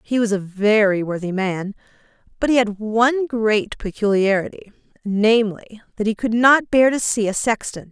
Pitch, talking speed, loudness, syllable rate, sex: 215 Hz, 160 wpm, -19 LUFS, 4.8 syllables/s, female